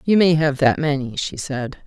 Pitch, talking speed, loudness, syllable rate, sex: 145 Hz, 225 wpm, -19 LUFS, 4.9 syllables/s, female